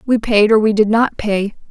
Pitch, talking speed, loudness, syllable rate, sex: 215 Hz, 245 wpm, -14 LUFS, 4.8 syllables/s, female